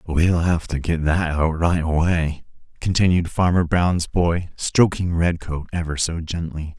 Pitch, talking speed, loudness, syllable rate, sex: 85 Hz, 150 wpm, -21 LUFS, 4.1 syllables/s, male